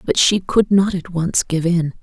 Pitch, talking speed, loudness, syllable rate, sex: 175 Hz, 235 wpm, -17 LUFS, 4.3 syllables/s, female